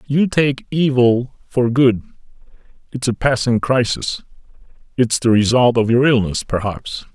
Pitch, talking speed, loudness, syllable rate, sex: 125 Hz, 135 wpm, -17 LUFS, 4.2 syllables/s, male